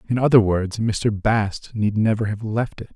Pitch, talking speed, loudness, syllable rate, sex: 110 Hz, 205 wpm, -21 LUFS, 4.5 syllables/s, male